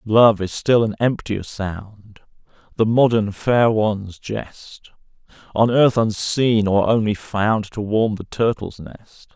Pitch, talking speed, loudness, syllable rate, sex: 110 Hz, 150 wpm, -19 LUFS, 3.7 syllables/s, male